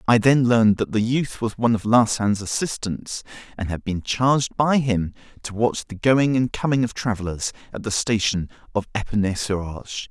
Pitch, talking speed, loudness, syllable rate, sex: 110 Hz, 190 wpm, -22 LUFS, 5.2 syllables/s, male